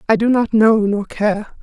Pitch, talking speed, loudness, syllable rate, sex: 215 Hz, 220 wpm, -16 LUFS, 4.2 syllables/s, female